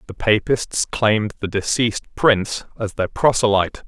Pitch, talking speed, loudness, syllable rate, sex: 110 Hz, 140 wpm, -19 LUFS, 4.8 syllables/s, male